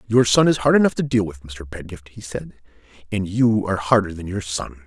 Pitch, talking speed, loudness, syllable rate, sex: 100 Hz, 235 wpm, -20 LUFS, 5.6 syllables/s, male